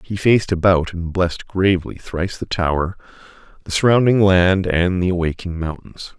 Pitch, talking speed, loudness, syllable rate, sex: 90 Hz, 155 wpm, -18 LUFS, 5.2 syllables/s, male